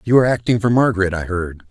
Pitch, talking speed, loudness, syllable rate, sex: 105 Hz, 245 wpm, -17 LUFS, 7.1 syllables/s, male